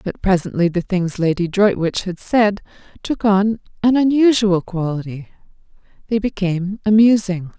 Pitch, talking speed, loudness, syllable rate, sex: 195 Hz, 125 wpm, -17 LUFS, 4.6 syllables/s, female